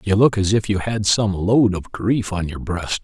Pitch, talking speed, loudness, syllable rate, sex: 100 Hz, 255 wpm, -19 LUFS, 4.4 syllables/s, male